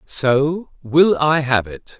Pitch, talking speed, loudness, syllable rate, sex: 140 Hz, 150 wpm, -17 LUFS, 2.8 syllables/s, male